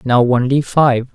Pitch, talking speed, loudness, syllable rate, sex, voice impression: 130 Hz, 155 wpm, -14 LUFS, 3.9 syllables/s, male, masculine, slightly feminine, very gender-neutral, very adult-like, slightly middle-aged, slightly thick, slightly relaxed, weak, slightly dark, very soft, slightly muffled, fluent, intellectual, slightly refreshing, very sincere, very calm, slightly mature, slightly friendly, reassuring, very unique, elegant, slightly wild, sweet, very kind, modest